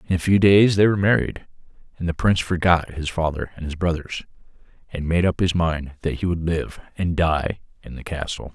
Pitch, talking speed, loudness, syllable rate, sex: 85 Hz, 210 wpm, -21 LUFS, 5.4 syllables/s, male